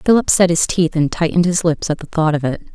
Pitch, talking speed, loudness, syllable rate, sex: 165 Hz, 285 wpm, -16 LUFS, 6.2 syllables/s, female